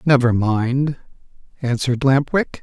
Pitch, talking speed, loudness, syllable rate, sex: 130 Hz, 115 wpm, -19 LUFS, 4.0 syllables/s, male